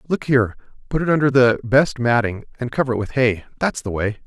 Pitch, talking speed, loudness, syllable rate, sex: 125 Hz, 210 wpm, -19 LUFS, 5.9 syllables/s, male